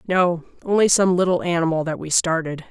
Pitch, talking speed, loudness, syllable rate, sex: 170 Hz, 175 wpm, -20 LUFS, 5.6 syllables/s, female